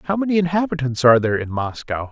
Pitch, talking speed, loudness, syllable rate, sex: 145 Hz, 200 wpm, -19 LUFS, 7.3 syllables/s, male